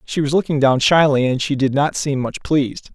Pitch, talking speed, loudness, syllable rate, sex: 140 Hz, 245 wpm, -17 LUFS, 5.5 syllables/s, male